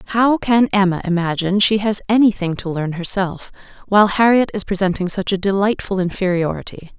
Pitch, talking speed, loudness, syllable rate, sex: 195 Hz, 165 wpm, -17 LUFS, 5.5 syllables/s, female